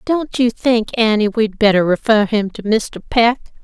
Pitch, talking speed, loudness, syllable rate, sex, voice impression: 220 Hz, 180 wpm, -16 LUFS, 4.3 syllables/s, female, feminine, slightly adult-like, slightly cute, slightly calm, slightly elegant